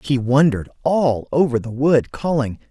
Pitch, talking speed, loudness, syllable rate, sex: 130 Hz, 155 wpm, -18 LUFS, 4.8 syllables/s, male